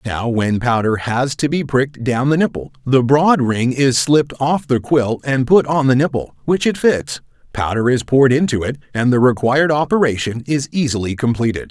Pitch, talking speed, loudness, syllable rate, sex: 130 Hz, 195 wpm, -16 LUFS, 5.1 syllables/s, male